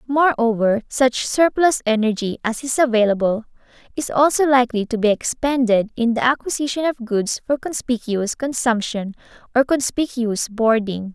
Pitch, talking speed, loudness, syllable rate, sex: 240 Hz, 130 wpm, -19 LUFS, 4.8 syllables/s, female